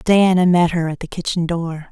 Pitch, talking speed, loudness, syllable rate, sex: 170 Hz, 220 wpm, -17 LUFS, 5.0 syllables/s, female